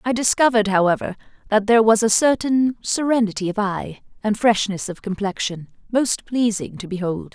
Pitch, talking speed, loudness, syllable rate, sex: 215 Hz, 155 wpm, -20 LUFS, 5.3 syllables/s, female